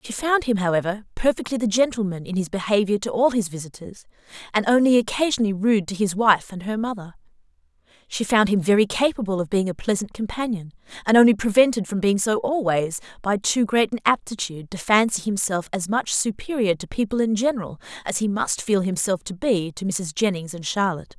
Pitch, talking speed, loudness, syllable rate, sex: 205 Hz, 195 wpm, -22 LUFS, 5.8 syllables/s, female